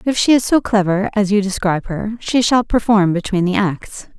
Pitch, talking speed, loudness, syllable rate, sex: 205 Hz, 215 wpm, -16 LUFS, 5.1 syllables/s, female